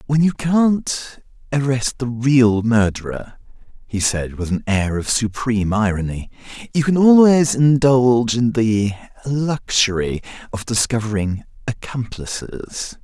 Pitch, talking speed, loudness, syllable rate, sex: 120 Hz, 115 wpm, -18 LUFS, 4.0 syllables/s, male